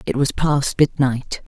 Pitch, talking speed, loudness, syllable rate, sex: 135 Hz, 155 wpm, -19 LUFS, 3.7 syllables/s, female